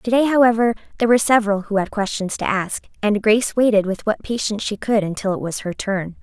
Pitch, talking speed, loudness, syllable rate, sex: 210 Hz, 230 wpm, -19 LUFS, 6.2 syllables/s, female